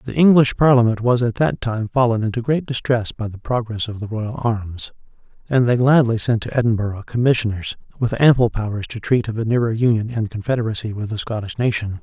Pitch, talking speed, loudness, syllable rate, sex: 115 Hz, 200 wpm, -19 LUFS, 5.7 syllables/s, male